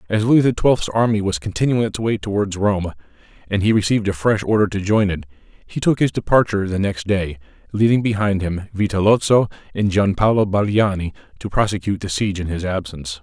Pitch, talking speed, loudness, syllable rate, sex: 100 Hz, 190 wpm, -19 LUFS, 5.9 syllables/s, male